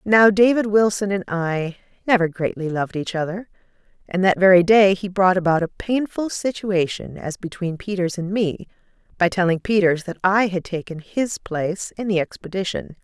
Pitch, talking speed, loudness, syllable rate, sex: 190 Hz, 170 wpm, -20 LUFS, 5.0 syllables/s, female